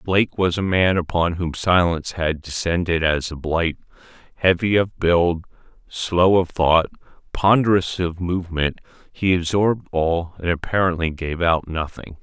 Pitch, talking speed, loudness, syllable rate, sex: 85 Hz, 140 wpm, -20 LUFS, 4.5 syllables/s, male